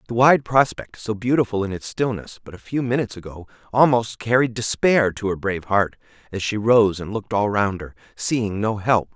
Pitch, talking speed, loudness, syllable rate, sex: 110 Hz, 205 wpm, -21 LUFS, 5.3 syllables/s, male